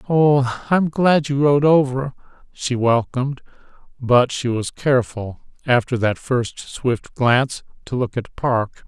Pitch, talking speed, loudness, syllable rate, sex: 130 Hz, 135 wpm, -19 LUFS, 3.9 syllables/s, male